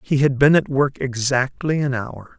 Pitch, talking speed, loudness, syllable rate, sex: 135 Hz, 200 wpm, -19 LUFS, 4.4 syllables/s, male